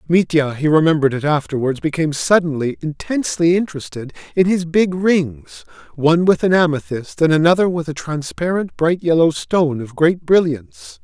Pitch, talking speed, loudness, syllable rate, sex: 155 Hz, 150 wpm, -17 LUFS, 4.8 syllables/s, male